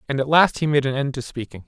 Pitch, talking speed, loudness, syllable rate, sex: 140 Hz, 325 wpm, -20 LUFS, 6.7 syllables/s, male